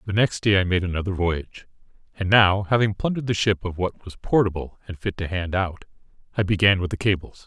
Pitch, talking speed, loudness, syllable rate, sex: 95 Hz, 215 wpm, -22 LUFS, 5.9 syllables/s, male